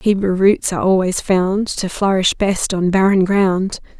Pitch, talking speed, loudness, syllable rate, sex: 190 Hz, 165 wpm, -16 LUFS, 4.2 syllables/s, female